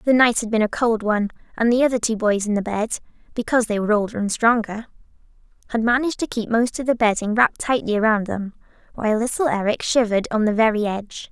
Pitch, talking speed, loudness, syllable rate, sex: 225 Hz, 220 wpm, -20 LUFS, 6.6 syllables/s, female